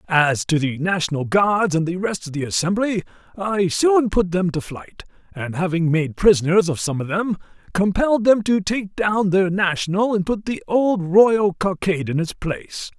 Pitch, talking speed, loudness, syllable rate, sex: 185 Hz, 190 wpm, -20 LUFS, 4.7 syllables/s, male